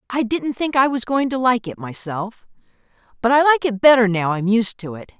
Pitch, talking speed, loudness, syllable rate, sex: 230 Hz, 230 wpm, -18 LUFS, 5.2 syllables/s, female